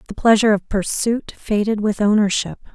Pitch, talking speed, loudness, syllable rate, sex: 210 Hz, 155 wpm, -18 LUFS, 5.4 syllables/s, female